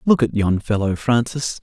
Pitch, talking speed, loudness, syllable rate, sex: 115 Hz, 185 wpm, -19 LUFS, 4.6 syllables/s, male